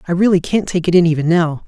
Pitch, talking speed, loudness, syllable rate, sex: 175 Hz, 285 wpm, -15 LUFS, 6.7 syllables/s, male